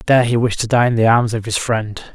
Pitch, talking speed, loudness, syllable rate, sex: 115 Hz, 310 wpm, -16 LUFS, 6.1 syllables/s, male